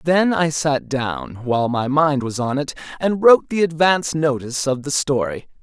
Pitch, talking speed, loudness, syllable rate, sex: 145 Hz, 190 wpm, -19 LUFS, 5.0 syllables/s, male